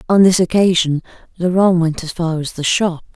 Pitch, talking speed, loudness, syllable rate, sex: 175 Hz, 190 wpm, -16 LUFS, 5.1 syllables/s, female